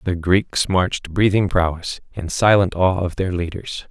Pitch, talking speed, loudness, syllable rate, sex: 90 Hz, 170 wpm, -19 LUFS, 4.4 syllables/s, male